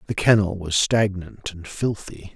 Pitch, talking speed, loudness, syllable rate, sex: 95 Hz, 155 wpm, -21 LUFS, 4.2 syllables/s, male